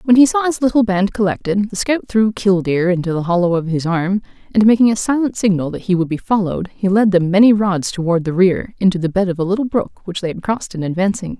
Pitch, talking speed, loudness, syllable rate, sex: 195 Hz, 255 wpm, -16 LUFS, 6.1 syllables/s, female